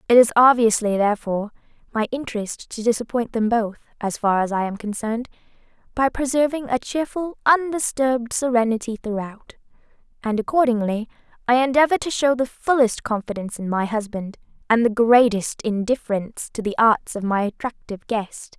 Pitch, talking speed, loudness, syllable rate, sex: 235 Hz, 150 wpm, -21 LUFS, 5.5 syllables/s, female